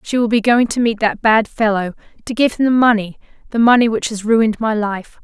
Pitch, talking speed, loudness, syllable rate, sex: 225 Hz, 230 wpm, -15 LUFS, 5.6 syllables/s, female